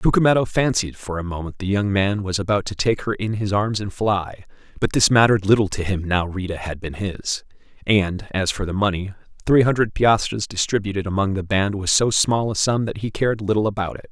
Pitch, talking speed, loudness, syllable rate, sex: 100 Hz, 220 wpm, -21 LUFS, 5.6 syllables/s, male